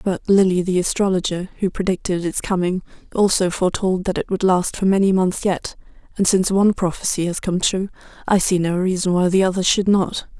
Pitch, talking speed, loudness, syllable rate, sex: 185 Hz, 195 wpm, -19 LUFS, 5.7 syllables/s, female